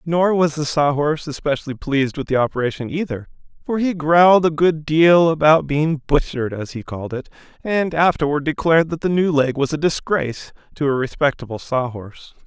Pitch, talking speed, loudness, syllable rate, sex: 150 Hz, 190 wpm, -18 LUFS, 5.6 syllables/s, male